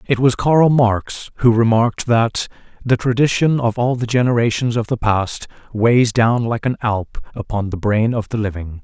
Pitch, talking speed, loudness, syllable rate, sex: 115 Hz, 185 wpm, -17 LUFS, 4.6 syllables/s, male